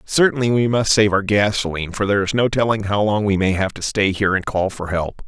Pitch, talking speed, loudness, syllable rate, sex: 105 Hz, 260 wpm, -18 LUFS, 6.0 syllables/s, male